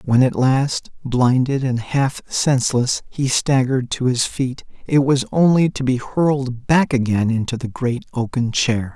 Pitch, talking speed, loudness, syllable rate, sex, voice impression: 130 Hz, 170 wpm, -19 LUFS, 4.2 syllables/s, male, masculine, adult-like, refreshing, slightly sincere, slightly elegant